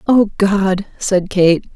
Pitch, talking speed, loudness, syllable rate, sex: 195 Hz, 135 wpm, -15 LUFS, 2.9 syllables/s, female